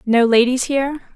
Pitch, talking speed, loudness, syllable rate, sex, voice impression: 255 Hz, 155 wpm, -16 LUFS, 5.5 syllables/s, female, feminine, adult-like, tensed, powerful, bright, clear, slightly raspy, intellectual, friendly, reassuring, elegant, lively, slightly kind